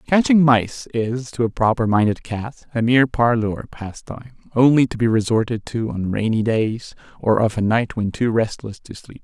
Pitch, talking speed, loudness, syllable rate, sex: 115 Hz, 190 wpm, -19 LUFS, 4.8 syllables/s, male